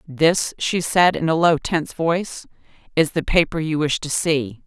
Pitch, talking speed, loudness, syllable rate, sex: 160 Hz, 195 wpm, -20 LUFS, 4.6 syllables/s, female